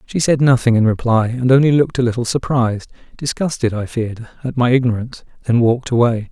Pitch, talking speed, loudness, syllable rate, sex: 120 Hz, 170 wpm, -16 LUFS, 6.3 syllables/s, male